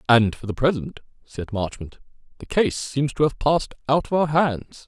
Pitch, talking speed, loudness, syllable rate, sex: 135 Hz, 195 wpm, -22 LUFS, 4.9 syllables/s, male